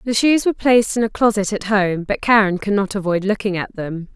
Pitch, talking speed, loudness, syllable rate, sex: 205 Hz, 245 wpm, -18 LUFS, 5.7 syllables/s, female